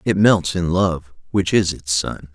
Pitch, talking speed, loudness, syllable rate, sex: 90 Hz, 205 wpm, -19 LUFS, 4.0 syllables/s, male